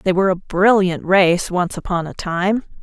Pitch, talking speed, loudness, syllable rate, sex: 185 Hz, 190 wpm, -17 LUFS, 4.6 syllables/s, female